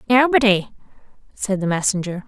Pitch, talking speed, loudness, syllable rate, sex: 210 Hz, 105 wpm, -19 LUFS, 5.3 syllables/s, female